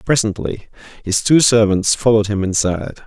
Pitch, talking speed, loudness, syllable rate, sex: 105 Hz, 135 wpm, -16 LUFS, 5.4 syllables/s, male